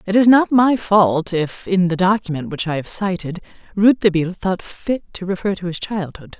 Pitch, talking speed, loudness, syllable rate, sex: 190 Hz, 195 wpm, -18 LUFS, 5.1 syllables/s, female